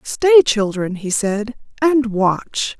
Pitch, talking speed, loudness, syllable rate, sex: 230 Hz, 130 wpm, -17 LUFS, 2.9 syllables/s, female